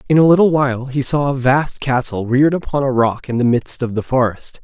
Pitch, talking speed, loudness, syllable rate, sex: 130 Hz, 245 wpm, -16 LUFS, 5.6 syllables/s, male